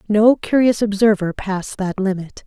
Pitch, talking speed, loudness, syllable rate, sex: 205 Hz, 145 wpm, -18 LUFS, 4.8 syllables/s, female